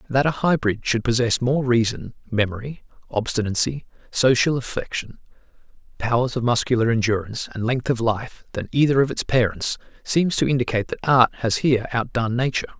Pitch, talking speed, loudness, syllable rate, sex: 120 Hz, 155 wpm, -21 LUFS, 5.7 syllables/s, male